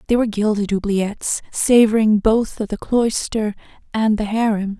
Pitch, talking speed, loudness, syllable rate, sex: 215 Hz, 150 wpm, -18 LUFS, 4.9 syllables/s, female